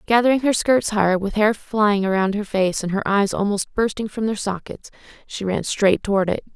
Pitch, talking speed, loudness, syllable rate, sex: 205 Hz, 210 wpm, -20 LUFS, 5.3 syllables/s, female